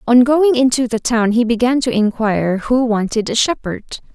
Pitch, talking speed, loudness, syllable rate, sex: 240 Hz, 190 wpm, -15 LUFS, 5.1 syllables/s, female